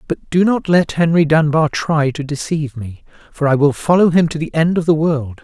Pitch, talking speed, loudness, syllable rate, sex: 155 Hz, 230 wpm, -15 LUFS, 5.2 syllables/s, male